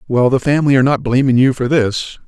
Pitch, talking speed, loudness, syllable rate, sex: 130 Hz, 235 wpm, -14 LUFS, 6.7 syllables/s, male